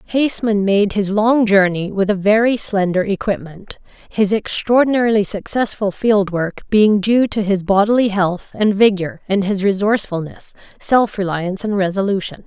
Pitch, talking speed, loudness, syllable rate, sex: 205 Hz, 145 wpm, -16 LUFS, 4.9 syllables/s, female